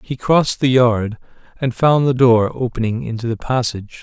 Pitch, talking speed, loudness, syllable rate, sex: 120 Hz, 180 wpm, -17 LUFS, 5.1 syllables/s, male